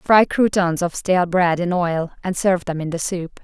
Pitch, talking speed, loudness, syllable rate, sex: 175 Hz, 225 wpm, -19 LUFS, 4.9 syllables/s, female